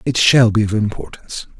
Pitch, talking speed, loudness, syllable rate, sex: 110 Hz, 190 wpm, -15 LUFS, 5.8 syllables/s, male